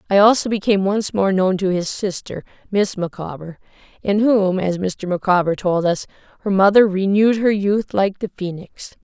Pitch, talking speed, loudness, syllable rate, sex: 195 Hz, 175 wpm, -18 LUFS, 4.9 syllables/s, female